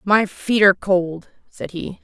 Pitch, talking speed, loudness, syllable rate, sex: 190 Hz, 175 wpm, -18 LUFS, 4.1 syllables/s, female